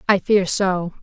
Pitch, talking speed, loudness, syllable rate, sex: 190 Hz, 175 wpm, -18 LUFS, 3.7 syllables/s, female